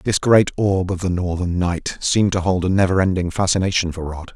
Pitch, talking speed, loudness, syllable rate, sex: 90 Hz, 220 wpm, -19 LUFS, 5.5 syllables/s, male